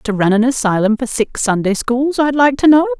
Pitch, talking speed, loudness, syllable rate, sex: 250 Hz, 240 wpm, -14 LUFS, 5.2 syllables/s, female